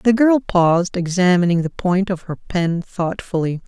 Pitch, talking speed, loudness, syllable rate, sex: 185 Hz, 165 wpm, -18 LUFS, 4.5 syllables/s, female